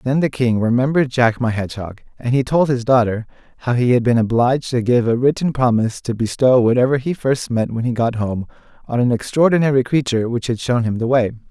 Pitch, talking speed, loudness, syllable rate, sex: 125 Hz, 220 wpm, -17 LUFS, 6.0 syllables/s, male